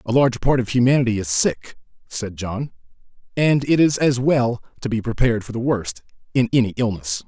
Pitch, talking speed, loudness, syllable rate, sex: 120 Hz, 190 wpm, -20 LUFS, 5.5 syllables/s, male